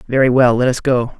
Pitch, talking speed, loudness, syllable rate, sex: 125 Hz, 250 wpm, -14 LUFS, 5.8 syllables/s, male